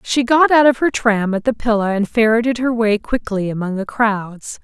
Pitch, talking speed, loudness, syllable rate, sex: 225 Hz, 220 wpm, -16 LUFS, 4.9 syllables/s, female